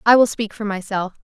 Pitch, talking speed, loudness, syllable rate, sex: 210 Hz, 245 wpm, -20 LUFS, 5.7 syllables/s, female